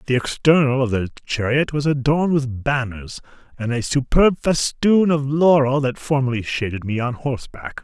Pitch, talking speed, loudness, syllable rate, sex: 135 Hz, 160 wpm, -19 LUFS, 4.9 syllables/s, male